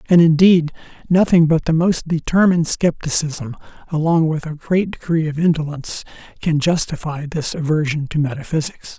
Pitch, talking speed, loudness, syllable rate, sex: 160 Hz, 140 wpm, -18 LUFS, 5.2 syllables/s, male